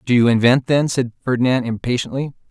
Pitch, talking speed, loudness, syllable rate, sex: 125 Hz, 170 wpm, -18 LUFS, 5.6 syllables/s, male